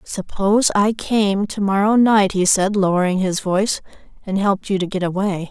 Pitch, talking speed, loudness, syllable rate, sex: 195 Hz, 185 wpm, -18 LUFS, 5.1 syllables/s, female